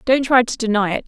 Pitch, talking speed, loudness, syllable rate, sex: 235 Hz, 280 wpm, -17 LUFS, 6.2 syllables/s, female